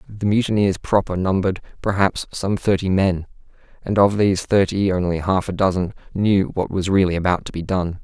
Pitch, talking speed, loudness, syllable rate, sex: 95 Hz, 180 wpm, -20 LUFS, 5.4 syllables/s, male